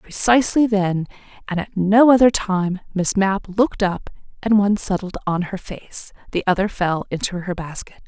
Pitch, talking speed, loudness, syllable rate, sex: 195 Hz, 170 wpm, -19 LUFS, 4.9 syllables/s, female